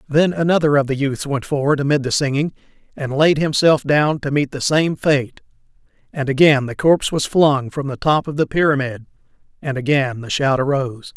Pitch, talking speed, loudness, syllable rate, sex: 145 Hz, 195 wpm, -18 LUFS, 5.3 syllables/s, male